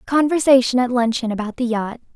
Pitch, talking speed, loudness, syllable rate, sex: 245 Hz, 165 wpm, -18 LUFS, 5.8 syllables/s, female